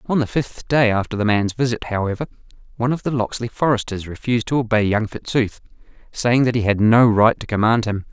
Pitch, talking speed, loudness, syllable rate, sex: 115 Hz, 205 wpm, -19 LUFS, 5.9 syllables/s, male